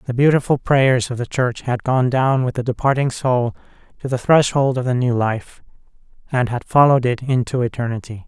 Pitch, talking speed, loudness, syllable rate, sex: 125 Hz, 190 wpm, -18 LUFS, 5.3 syllables/s, male